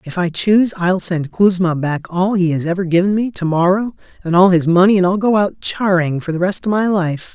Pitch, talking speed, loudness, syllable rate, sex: 185 Hz, 245 wpm, -15 LUFS, 5.3 syllables/s, male